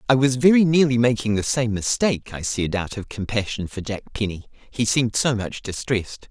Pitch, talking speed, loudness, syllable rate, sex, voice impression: 115 Hz, 190 wpm, -22 LUFS, 5.5 syllables/s, male, masculine, adult-like, tensed, powerful, bright, clear, fluent, cool, intellectual, refreshing, sincere, friendly, lively, kind